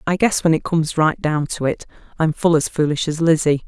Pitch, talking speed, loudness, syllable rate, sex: 160 Hz, 245 wpm, -18 LUFS, 5.6 syllables/s, female